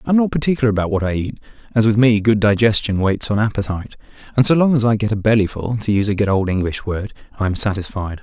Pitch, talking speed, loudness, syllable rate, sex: 110 Hz, 235 wpm, -18 LUFS, 6.9 syllables/s, male